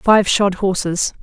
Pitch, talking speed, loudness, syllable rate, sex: 190 Hz, 145 wpm, -16 LUFS, 3.5 syllables/s, female